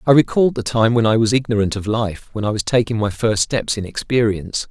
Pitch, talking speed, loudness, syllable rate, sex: 110 Hz, 240 wpm, -18 LUFS, 6.0 syllables/s, male